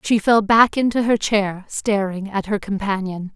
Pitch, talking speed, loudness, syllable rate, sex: 205 Hz, 180 wpm, -19 LUFS, 4.4 syllables/s, female